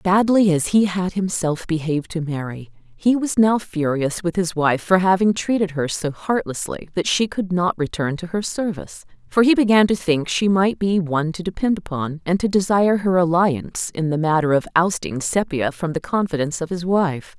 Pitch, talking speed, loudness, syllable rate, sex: 175 Hz, 200 wpm, -20 LUFS, 5.1 syllables/s, female